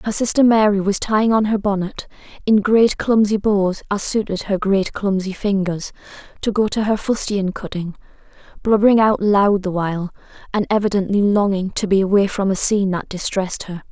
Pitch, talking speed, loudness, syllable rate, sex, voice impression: 200 Hz, 175 wpm, -18 LUFS, 4.3 syllables/s, female, feminine, young, slightly soft, cute, friendly, slightly kind